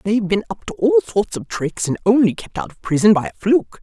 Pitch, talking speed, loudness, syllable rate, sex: 200 Hz, 265 wpm, -18 LUFS, 6.0 syllables/s, female